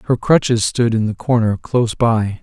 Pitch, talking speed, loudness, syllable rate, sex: 115 Hz, 200 wpm, -16 LUFS, 4.6 syllables/s, male